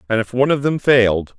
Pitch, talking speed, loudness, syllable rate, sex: 115 Hz, 260 wpm, -16 LUFS, 6.7 syllables/s, male